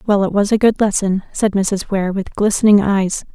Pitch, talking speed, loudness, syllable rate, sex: 200 Hz, 215 wpm, -16 LUFS, 4.9 syllables/s, female